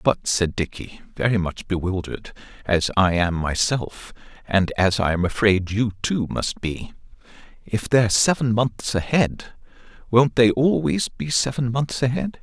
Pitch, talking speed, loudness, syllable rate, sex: 110 Hz, 150 wpm, -21 LUFS, 4.3 syllables/s, male